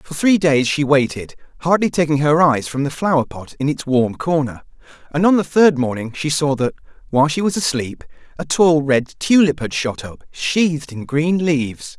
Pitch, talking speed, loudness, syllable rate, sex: 150 Hz, 200 wpm, -17 LUFS, 4.9 syllables/s, male